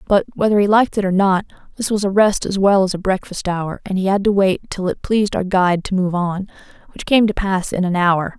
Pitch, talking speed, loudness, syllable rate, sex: 190 Hz, 265 wpm, -17 LUFS, 5.8 syllables/s, female